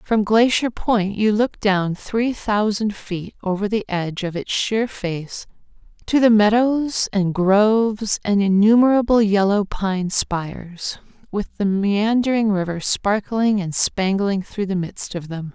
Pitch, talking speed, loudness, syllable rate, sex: 205 Hz, 145 wpm, -19 LUFS, 3.8 syllables/s, female